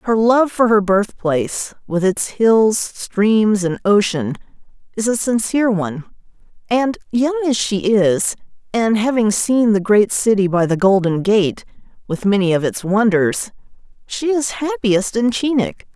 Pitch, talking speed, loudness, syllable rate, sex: 215 Hz, 150 wpm, -17 LUFS, 4.2 syllables/s, female